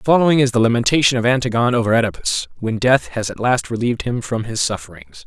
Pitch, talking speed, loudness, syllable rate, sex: 120 Hz, 215 wpm, -18 LUFS, 6.8 syllables/s, male